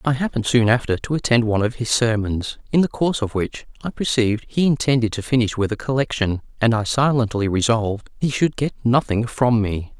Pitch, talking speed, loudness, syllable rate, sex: 120 Hz, 205 wpm, -20 LUFS, 5.8 syllables/s, male